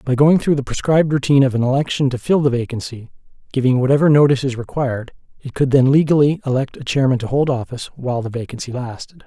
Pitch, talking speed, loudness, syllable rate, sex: 135 Hz, 205 wpm, -17 LUFS, 6.8 syllables/s, male